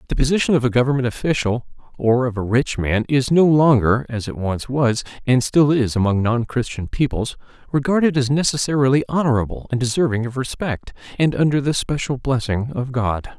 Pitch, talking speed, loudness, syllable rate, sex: 130 Hz, 180 wpm, -19 LUFS, 5.5 syllables/s, male